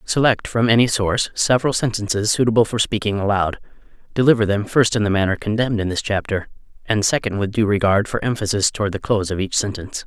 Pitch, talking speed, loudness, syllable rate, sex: 105 Hz, 195 wpm, -19 LUFS, 6.4 syllables/s, male